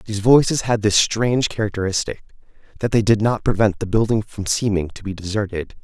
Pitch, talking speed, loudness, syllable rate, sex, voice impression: 105 Hz, 185 wpm, -19 LUFS, 5.8 syllables/s, male, masculine, adult-like, tensed, powerful, clear, fluent, raspy, cool, intellectual, calm, friendly, reassuring, wild, slightly lively, slightly kind